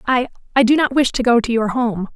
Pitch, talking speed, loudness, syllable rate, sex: 240 Hz, 250 wpm, -17 LUFS, 5.9 syllables/s, female